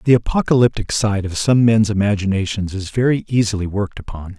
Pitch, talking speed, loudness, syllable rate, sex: 105 Hz, 165 wpm, -17 LUFS, 5.9 syllables/s, male